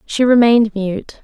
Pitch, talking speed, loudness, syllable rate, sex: 220 Hz, 145 wpm, -14 LUFS, 4.5 syllables/s, female